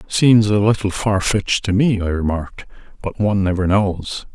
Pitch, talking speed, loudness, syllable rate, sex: 100 Hz, 180 wpm, -17 LUFS, 5.0 syllables/s, male